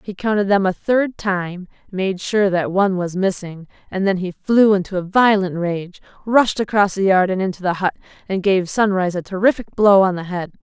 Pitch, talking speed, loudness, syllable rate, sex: 190 Hz, 210 wpm, -18 LUFS, 5.1 syllables/s, female